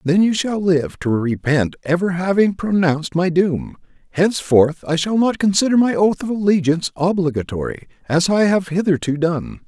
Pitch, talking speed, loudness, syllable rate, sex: 175 Hz, 160 wpm, -18 LUFS, 5.0 syllables/s, male